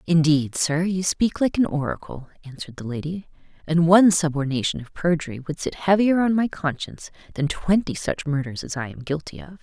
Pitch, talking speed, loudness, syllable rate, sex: 160 Hz, 185 wpm, -22 LUFS, 5.5 syllables/s, female